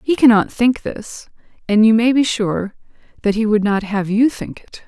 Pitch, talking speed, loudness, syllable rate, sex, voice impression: 220 Hz, 195 wpm, -16 LUFS, 4.7 syllables/s, female, very feminine, adult-like, slightly middle-aged, thin, slightly tensed, slightly weak, bright, soft, clear, fluent, cute, slightly cool, very intellectual, refreshing, sincere, calm, friendly, very reassuring, slightly unique, elegant, slightly wild, sweet, lively, very kind